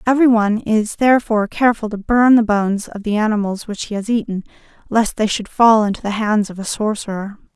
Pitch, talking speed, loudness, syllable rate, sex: 215 Hz, 205 wpm, -17 LUFS, 6.0 syllables/s, female